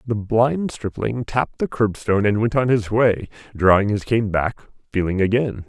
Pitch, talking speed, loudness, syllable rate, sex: 110 Hz, 180 wpm, -20 LUFS, 4.9 syllables/s, male